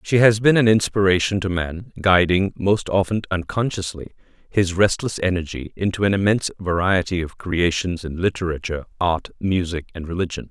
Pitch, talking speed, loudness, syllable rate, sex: 95 Hz, 150 wpm, -21 LUFS, 5.3 syllables/s, male